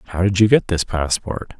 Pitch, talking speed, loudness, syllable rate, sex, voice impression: 90 Hz, 225 wpm, -18 LUFS, 4.5 syllables/s, male, masculine, adult-like, tensed, powerful, soft, muffled, intellectual, calm, wild, lively, kind